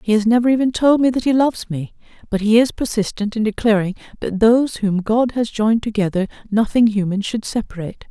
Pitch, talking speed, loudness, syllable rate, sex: 220 Hz, 200 wpm, -18 LUFS, 6.0 syllables/s, female